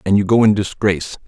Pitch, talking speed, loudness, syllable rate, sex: 100 Hz, 235 wpm, -16 LUFS, 6.4 syllables/s, male